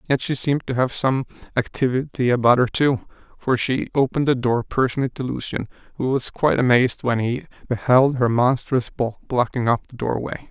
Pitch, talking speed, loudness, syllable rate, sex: 125 Hz, 185 wpm, -21 LUFS, 5.4 syllables/s, male